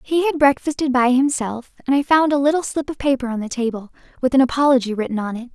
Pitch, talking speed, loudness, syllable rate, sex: 265 Hz, 240 wpm, -19 LUFS, 6.4 syllables/s, female